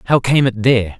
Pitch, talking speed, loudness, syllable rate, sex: 120 Hz, 240 wpm, -14 LUFS, 6.2 syllables/s, male